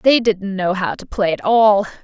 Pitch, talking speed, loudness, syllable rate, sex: 200 Hz, 235 wpm, -17 LUFS, 4.4 syllables/s, female